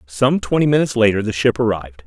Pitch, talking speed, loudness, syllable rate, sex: 115 Hz, 205 wpm, -17 LUFS, 6.7 syllables/s, male